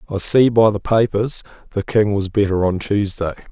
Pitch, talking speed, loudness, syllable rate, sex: 105 Hz, 190 wpm, -18 LUFS, 4.9 syllables/s, male